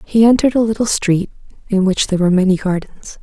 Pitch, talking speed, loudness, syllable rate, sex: 200 Hz, 205 wpm, -15 LUFS, 6.6 syllables/s, female